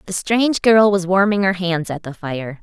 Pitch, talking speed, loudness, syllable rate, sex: 185 Hz, 230 wpm, -17 LUFS, 4.9 syllables/s, female